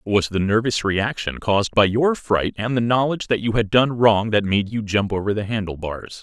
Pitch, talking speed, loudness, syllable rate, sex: 105 Hz, 230 wpm, -20 LUFS, 5.3 syllables/s, male